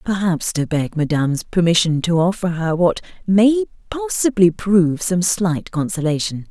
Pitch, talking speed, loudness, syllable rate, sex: 180 Hz, 140 wpm, -18 LUFS, 4.6 syllables/s, female